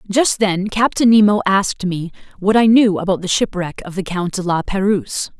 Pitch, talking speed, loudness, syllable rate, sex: 195 Hz, 200 wpm, -16 LUFS, 5.1 syllables/s, female